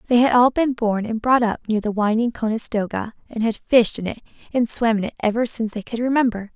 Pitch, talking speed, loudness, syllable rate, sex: 230 Hz, 240 wpm, -20 LUFS, 5.9 syllables/s, female